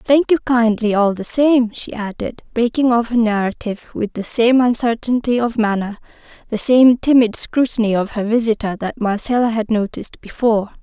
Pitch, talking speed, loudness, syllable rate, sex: 230 Hz, 165 wpm, -17 LUFS, 5.2 syllables/s, female